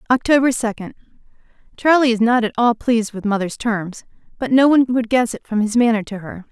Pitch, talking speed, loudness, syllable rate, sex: 230 Hz, 195 wpm, -17 LUFS, 5.9 syllables/s, female